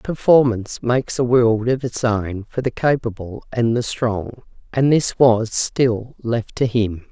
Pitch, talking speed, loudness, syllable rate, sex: 120 Hz, 170 wpm, -19 LUFS, 3.9 syllables/s, female